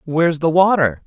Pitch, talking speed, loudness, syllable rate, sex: 160 Hz, 170 wpm, -16 LUFS, 5.3 syllables/s, male